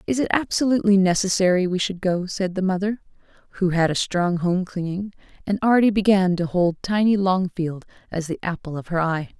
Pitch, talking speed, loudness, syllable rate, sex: 185 Hz, 185 wpm, -21 LUFS, 5.6 syllables/s, female